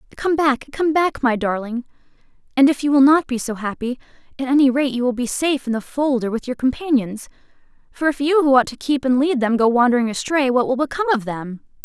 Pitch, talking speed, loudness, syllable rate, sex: 260 Hz, 235 wpm, -19 LUFS, 6.0 syllables/s, female